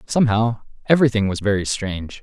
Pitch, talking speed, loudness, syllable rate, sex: 110 Hz, 110 wpm, -19 LUFS, 6.6 syllables/s, male